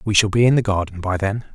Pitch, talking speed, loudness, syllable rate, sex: 100 Hz, 310 wpm, -19 LUFS, 6.3 syllables/s, male